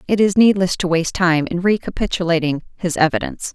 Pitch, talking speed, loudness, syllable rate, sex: 180 Hz, 170 wpm, -18 LUFS, 6.1 syllables/s, female